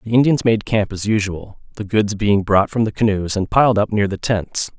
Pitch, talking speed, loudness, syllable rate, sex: 105 Hz, 240 wpm, -18 LUFS, 5.1 syllables/s, male